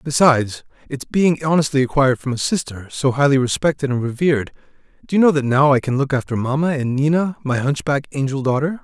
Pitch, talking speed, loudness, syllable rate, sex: 140 Hz, 195 wpm, -18 LUFS, 6.1 syllables/s, male